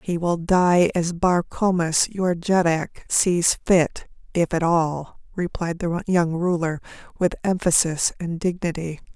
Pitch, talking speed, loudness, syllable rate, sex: 170 Hz, 140 wpm, -21 LUFS, 3.7 syllables/s, female